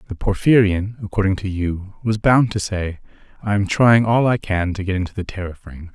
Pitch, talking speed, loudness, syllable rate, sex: 100 Hz, 210 wpm, -19 LUFS, 5.2 syllables/s, male